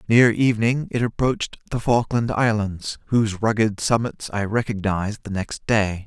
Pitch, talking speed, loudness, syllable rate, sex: 110 Hz, 150 wpm, -22 LUFS, 4.9 syllables/s, male